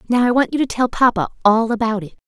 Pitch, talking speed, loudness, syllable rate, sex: 230 Hz, 265 wpm, -17 LUFS, 6.4 syllables/s, female